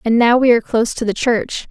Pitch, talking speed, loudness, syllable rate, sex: 230 Hz, 280 wpm, -15 LUFS, 6.2 syllables/s, female